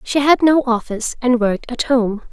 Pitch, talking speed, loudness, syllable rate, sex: 245 Hz, 205 wpm, -16 LUFS, 5.2 syllables/s, female